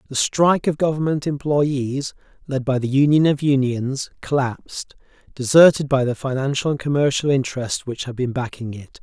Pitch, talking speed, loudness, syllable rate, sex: 135 Hz, 160 wpm, -20 LUFS, 5.1 syllables/s, male